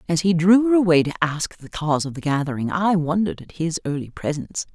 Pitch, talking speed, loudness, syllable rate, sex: 165 Hz, 230 wpm, -21 LUFS, 6.2 syllables/s, female